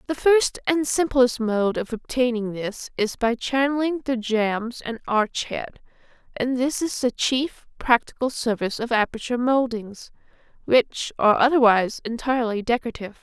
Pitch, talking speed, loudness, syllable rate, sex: 240 Hz, 140 wpm, -22 LUFS, 4.8 syllables/s, female